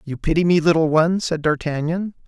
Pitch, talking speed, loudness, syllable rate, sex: 160 Hz, 185 wpm, -19 LUFS, 5.8 syllables/s, male